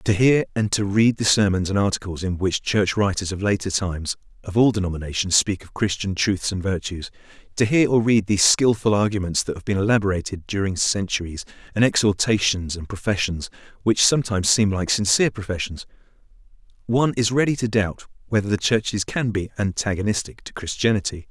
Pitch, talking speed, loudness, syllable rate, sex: 100 Hz, 170 wpm, -21 LUFS, 5.8 syllables/s, male